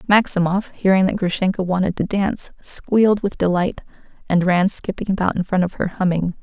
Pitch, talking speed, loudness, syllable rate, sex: 190 Hz, 175 wpm, -19 LUFS, 5.5 syllables/s, female